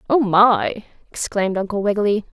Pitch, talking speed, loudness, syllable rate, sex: 210 Hz, 125 wpm, -18 LUFS, 5.5 syllables/s, female